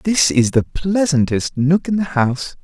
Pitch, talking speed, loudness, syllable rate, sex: 155 Hz, 180 wpm, -17 LUFS, 4.3 syllables/s, male